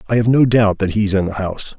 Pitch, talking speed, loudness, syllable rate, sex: 105 Hz, 305 wpm, -16 LUFS, 6.4 syllables/s, male